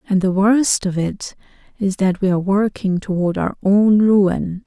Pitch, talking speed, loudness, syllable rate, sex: 195 Hz, 180 wpm, -17 LUFS, 4.3 syllables/s, female